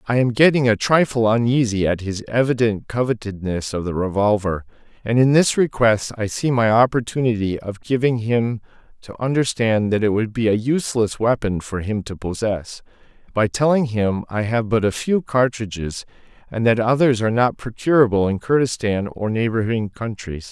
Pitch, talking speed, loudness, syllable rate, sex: 115 Hz, 165 wpm, -19 LUFS, 5.0 syllables/s, male